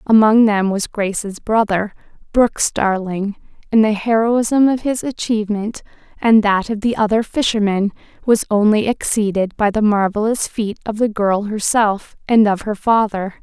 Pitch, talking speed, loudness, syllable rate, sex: 215 Hz, 150 wpm, -17 LUFS, 4.5 syllables/s, female